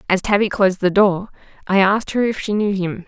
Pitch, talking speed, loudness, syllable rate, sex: 195 Hz, 235 wpm, -18 LUFS, 6.0 syllables/s, female